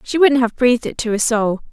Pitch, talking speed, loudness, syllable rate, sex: 240 Hz, 280 wpm, -16 LUFS, 5.8 syllables/s, female